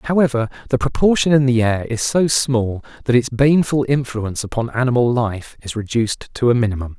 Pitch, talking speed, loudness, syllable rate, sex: 125 Hz, 180 wpm, -18 LUFS, 5.6 syllables/s, male